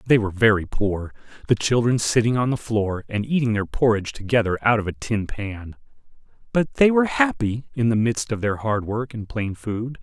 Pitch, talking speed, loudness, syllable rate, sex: 115 Hz, 205 wpm, -22 LUFS, 5.3 syllables/s, male